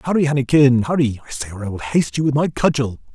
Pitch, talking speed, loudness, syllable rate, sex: 130 Hz, 250 wpm, -18 LUFS, 6.6 syllables/s, male